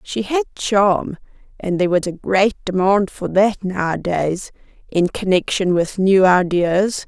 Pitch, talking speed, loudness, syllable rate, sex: 190 Hz, 145 wpm, -18 LUFS, 4.0 syllables/s, female